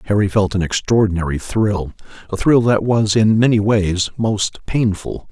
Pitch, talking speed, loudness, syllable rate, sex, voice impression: 105 Hz, 160 wpm, -17 LUFS, 4.6 syllables/s, male, very masculine, very adult-like, slightly old, very thick, slightly relaxed, very powerful, slightly dark, muffled, fluent, slightly raspy, cool, very intellectual, sincere, very calm, friendly, very reassuring, unique, slightly elegant, wild, sweet, kind, slightly modest